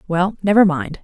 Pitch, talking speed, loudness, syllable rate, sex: 180 Hz, 175 wpm, -16 LUFS, 4.9 syllables/s, female